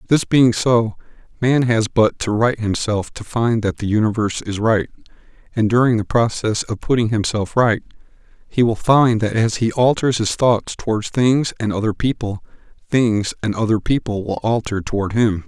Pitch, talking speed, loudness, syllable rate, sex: 115 Hz, 180 wpm, -18 LUFS, 4.8 syllables/s, male